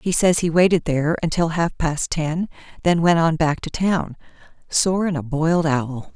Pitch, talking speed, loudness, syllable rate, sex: 165 Hz, 185 wpm, -20 LUFS, 4.6 syllables/s, female